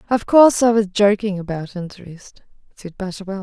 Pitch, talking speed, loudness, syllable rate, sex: 200 Hz, 160 wpm, -17 LUFS, 5.6 syllables/s, female